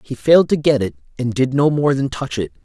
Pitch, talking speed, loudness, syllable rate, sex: 135 Hz, 275 wpm, -17 LUFS, 5.8 syllables/s, male